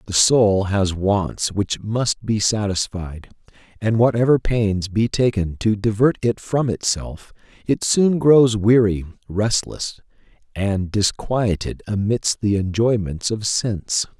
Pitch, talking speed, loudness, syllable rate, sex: 105 Hz, 125 wpm, -19 LUFS, 3.7 syllables/s, male